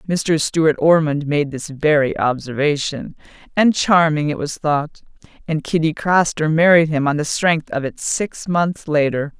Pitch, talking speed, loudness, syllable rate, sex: 155 Hz, 160 wpm, -18 LUFS, 4.2 syllables/s, female